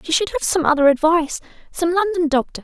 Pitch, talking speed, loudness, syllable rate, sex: 320 Hz, 180 wpm, -18 LUFS, 6.4 syllables/s, female